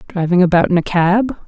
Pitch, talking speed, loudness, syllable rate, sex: 185 Hz, 205 wpm, -14 LUFS, 5.6 syllables/s, female